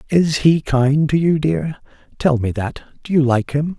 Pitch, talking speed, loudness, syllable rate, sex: 145 Hz, 205 wpm, -17 LUFS, 4.3 syllables/s, male